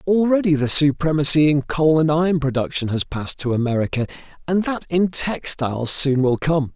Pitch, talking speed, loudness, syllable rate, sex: 150 Hz, 170 wpm, -19 LUFS, 5.4 syllables/s, male